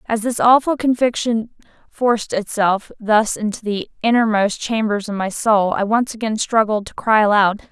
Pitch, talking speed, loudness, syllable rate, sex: 220 Hz, 165 wpm, -18 LUFS, 4.7 syllables/s, female